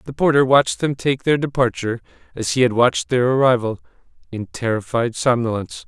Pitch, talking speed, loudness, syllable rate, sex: 125 Hz, 165 wpm, -19 LUFS, 5.9 syllables/s, male